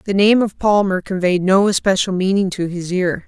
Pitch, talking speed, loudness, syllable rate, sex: 190 Hz, 200 wpm, -16 LUFS, 5.1 syllables/s, female